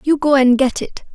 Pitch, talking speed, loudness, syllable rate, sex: 270 Hz, 260 wpm, -14 LUFS, 5.1 syllables/s, female